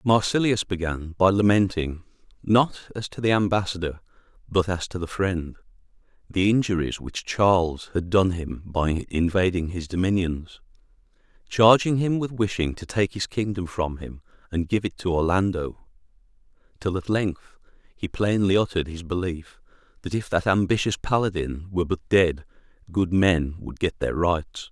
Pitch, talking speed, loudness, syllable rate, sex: 95 Hz, 150 wpm, -24 LUFS, 4.8 syllables/s, male